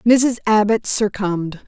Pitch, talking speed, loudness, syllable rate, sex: 210 Hz, 110 wpm, -17 LUFS, 3.9 syllables/s, female